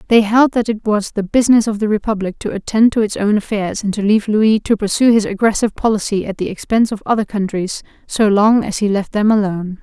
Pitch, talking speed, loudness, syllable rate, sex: 210 Hz, 230 wpm, -16 LUFS, 6.1 syllables/s, female